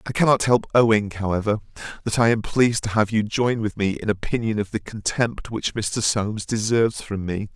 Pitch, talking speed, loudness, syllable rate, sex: 110 Hz, 205 wpm, -22 LUFS, 5.4 syllables/s, male